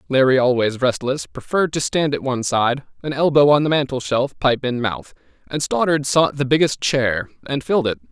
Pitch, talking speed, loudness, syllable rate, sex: 135 Hz, 190 wpm, -19 LUFS, 5.3 syllables/s, male